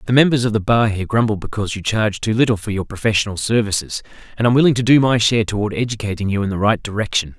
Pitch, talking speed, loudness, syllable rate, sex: 110 Hz, 245 wpm, -18 LUFS, 7.3 syllables/s, male